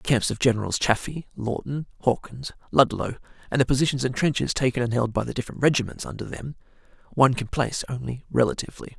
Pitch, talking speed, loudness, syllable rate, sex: 125 Hz, 180 wpm, -25 LUFS, 6.6 syllables/s, male